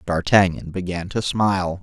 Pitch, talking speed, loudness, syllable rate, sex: 95 Hz, 130 wpm, -20 LUFS, 4.7 syllables/s, male